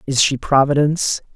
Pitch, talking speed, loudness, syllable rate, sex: 140 Hz, 135 wpm, -16 LUFS, 5.4 syllables/s, male